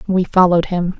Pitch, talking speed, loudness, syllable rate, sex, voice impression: 180 Hz, 180 wpm, -15 LUFS, 5.9 syllables/s, female, feminine, adult-like, slightly dark, calm, slightly reassuring